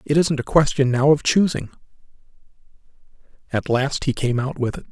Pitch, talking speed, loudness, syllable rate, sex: 140 Hz, 170 wpm, -20 LUFS, 5.4 syllables/s, male